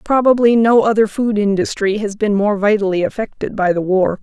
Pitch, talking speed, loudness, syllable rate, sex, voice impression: 210 Hz, 185 wpm, -15 LUFS, 5.3 syllables/s, female, very feminine, slightly young, slightly adult-like, very thin, tensed, slightly powerful, slightly bright, hard, clear, fluent, slightly raspy, cool, intellectual, very refreshing, sincere, very calm, friendly, slightly reassuring, slightly unique, slightly elegant, wild, slightly lively, strict, sharp, slightly modest